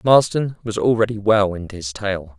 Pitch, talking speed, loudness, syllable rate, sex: 105 Hz, 175 wpm, -19 LUFS, 5.0 syllables/s, male